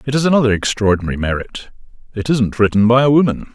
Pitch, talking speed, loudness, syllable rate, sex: 115 Hz, 170 wpm, -15 LUFS, 6.8 syllables/s, male